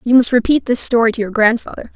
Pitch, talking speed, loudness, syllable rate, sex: 235 Hz, 245 wpm, -14 LUFS, 6.5 syllables/s, female